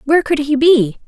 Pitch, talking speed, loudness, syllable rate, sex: 285 Hz, 225 wpm, -13 LUFS, 5.6 syllables/s, female